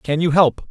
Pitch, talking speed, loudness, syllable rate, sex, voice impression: 155 Hz, 255 wpm, -16 LUFS, 4.5 syllables/s, male, masculine, middle-aged, tensed, powerful, slightly raspy, intellectual, slightly mature, wild, slightly sharp